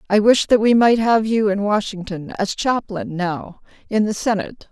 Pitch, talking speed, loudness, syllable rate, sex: 210 Hz, 180 wpm, -18 LUFS, 4.7 syllables/s, female